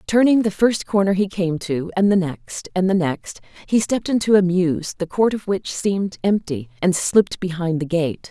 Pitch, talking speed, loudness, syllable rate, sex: 185 Hz, 210 wpm, -20 LUFS, 4.8 syllables/s, female